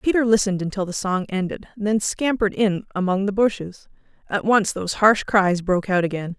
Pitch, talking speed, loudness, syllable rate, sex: 200 Hz, 190 wpm, -21 LUFS, 5.6 syllables/s, female